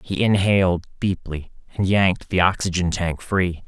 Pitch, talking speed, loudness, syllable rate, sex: 95 Hz, 145 wpm, -21 LUFS, 4.7 syllables/s, male